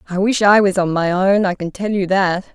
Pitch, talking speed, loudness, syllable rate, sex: 190 Hz, 285 wpm, -16 LUFS, 5.3 syllables/s, female